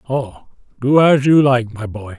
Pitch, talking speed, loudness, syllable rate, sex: 125 Hz, 190 wpm, -14 LUFS, 4.2 syllables/s, male